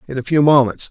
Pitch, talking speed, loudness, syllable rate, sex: 135 Hz, 265 wpm, -14 LUFS, 6.7 syllables/s, male